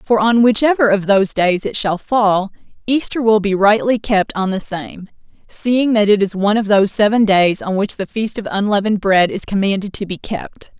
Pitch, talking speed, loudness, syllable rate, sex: 205 Hz, 210 wpm, -16 LUFS, 5.2 syllables/s, female